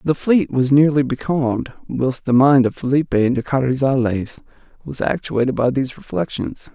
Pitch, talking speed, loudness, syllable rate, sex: 135 Hz, 150 wpm, -18 LUFS, 4.9 syllables/s, male